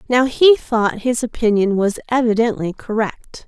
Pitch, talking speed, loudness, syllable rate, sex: 230 Hz, 140 wpm, -17 LUFS, 4.4 syllables/s, female